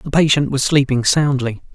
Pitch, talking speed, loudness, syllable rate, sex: 140 Hz, 170 wpm, -16 LUFS, 5.0 syllables/s, male